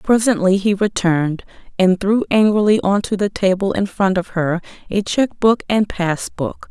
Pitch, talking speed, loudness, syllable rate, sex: 195 Hz, 180 wpm, -17 LUFS, 4.7 syllables/s, female